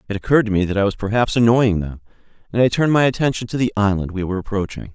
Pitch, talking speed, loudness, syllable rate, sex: 105 Hz, 255 wpm, -18 LUFS, 7.6 syllables/s, male